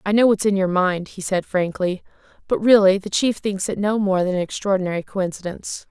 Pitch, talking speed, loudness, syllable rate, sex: 195 Hz, 215 wpm, -20 LUFS, 5.6 syllables/s, female